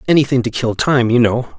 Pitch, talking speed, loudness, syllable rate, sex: 125 Hz, 225 wpm, -15 LUFS, 5.8 syllables/s, male